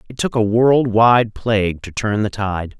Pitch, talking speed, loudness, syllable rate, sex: 110 Hz, 195 wpm, -17 LUFS, 4.2 syllables/s, male